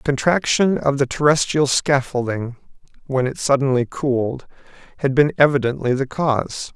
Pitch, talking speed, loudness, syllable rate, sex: 135 Hz, 135 wpm, -19 LUFS, 5.1 syllables/s, male